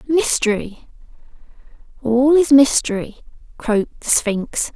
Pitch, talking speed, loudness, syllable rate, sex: 250 Hz, 90 wpm, -17 LUFS, 3.9 syllables/s, female